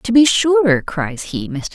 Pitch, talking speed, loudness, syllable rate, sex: 205 Hz, 205 wpm, -16 LUFS, 3.5 syllables/s, female